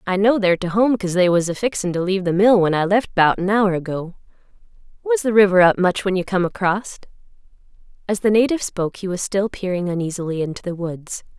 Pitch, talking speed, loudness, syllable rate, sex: 185 Hz, 220 wpm, -19 LUFS, 6.2 syllables/s, female